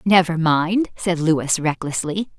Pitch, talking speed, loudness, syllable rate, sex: 170 Hz, 125 wpm, -20 LUFS, 3.7 syllables/s, female